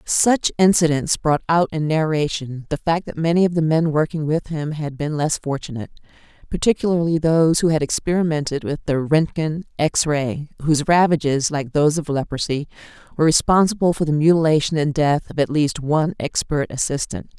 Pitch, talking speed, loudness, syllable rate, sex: 155 Hz, 170 wpm, -19 LUFS, 5.5 syllables/s, female